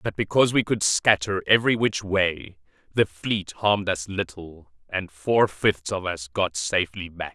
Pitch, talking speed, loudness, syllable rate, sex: 95 Hz, 170 wpm, -23 LUFS, 4.4 syllables/s, male